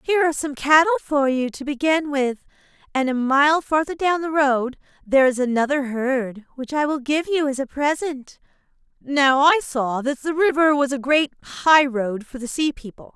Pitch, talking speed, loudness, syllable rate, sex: 280 Hz, 195 wpm, -20 LUFS, 4.9 syllables/s, female